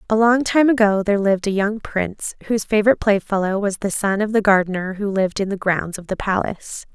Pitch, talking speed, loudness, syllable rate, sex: 205 Hz, 225 wpm, -19 LUFS, 6.3 syllables/s, female